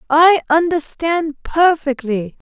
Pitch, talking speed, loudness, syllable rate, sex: 305 Hz, 70 wpm, -16 LUFS, 3.4 syllables/s, female